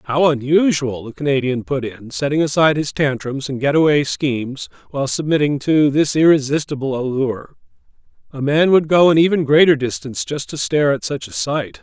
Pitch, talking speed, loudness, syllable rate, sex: 145 Hz, 175 wpm, -17 LUFS, 5.6 syllables/s, male